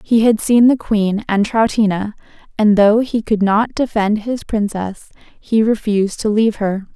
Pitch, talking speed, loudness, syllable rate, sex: 215 Hz, 175 wpm, -16 LUFS, 4.4 syllables/s, female